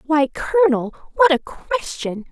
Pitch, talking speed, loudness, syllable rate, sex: 310 Hz, 130 wpm, -19 LUFS, 4.2 syllables/s, female